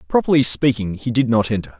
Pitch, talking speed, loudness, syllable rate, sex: 120 Hz, 200 wpm, -18 LUFS, 6.2 syllables/s, male